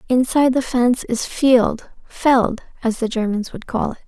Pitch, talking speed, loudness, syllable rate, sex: 240 Hz, 160 wpm, -18 LUFS, 4.7 syllables/s, female